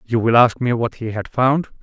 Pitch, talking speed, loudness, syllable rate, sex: 120 Hz, 260 wpm, -18 LUFS, 5.0 syllables/s, male